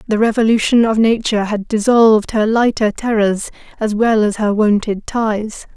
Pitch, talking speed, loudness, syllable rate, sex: 215 Hz, 155 wpm, -15 LUFS, 4.8 syllables/s, female